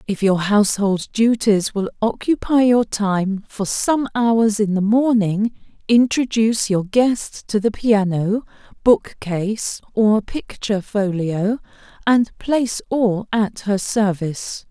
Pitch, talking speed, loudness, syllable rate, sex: 215 Hz, 125 wpm, -19 LUFS, 3.7 syllables/s, female